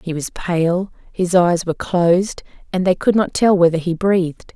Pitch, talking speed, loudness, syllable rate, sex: 175 Hz, 200 wpm, -17 LUFS, 4.8 syllables/s, female